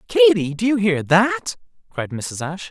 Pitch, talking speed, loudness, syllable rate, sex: 200 Hz, 180 wpm, -19 LUFS, 4.5 syllables/s, male